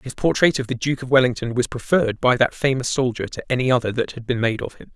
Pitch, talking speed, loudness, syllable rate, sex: 125 Hz, 265 wpm, -20 LUFS, 6.4 syllables/s, male